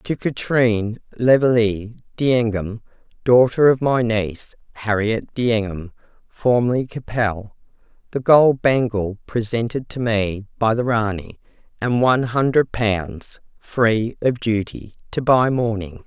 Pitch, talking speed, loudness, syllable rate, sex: 115 Hz, 115 wpm, -19 LUFS, 3.9 syllables/s, female